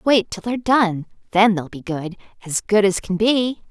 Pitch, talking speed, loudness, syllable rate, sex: 205 Hz, 195 wpm, -19 LUFS, 4.7 syllables/s, female